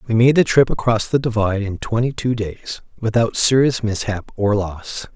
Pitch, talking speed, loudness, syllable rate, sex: 110 Hz, 185 wpm, -18 LUFS, 4.9 syllables/s, male